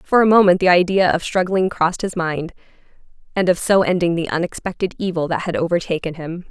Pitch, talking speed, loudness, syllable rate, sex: 175 Hz, 195 wpm, -18 LUFS, 6.0 syllables/s, female